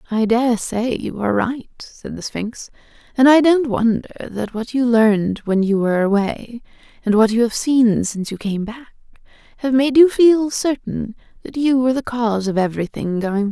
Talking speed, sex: 215 wpm, female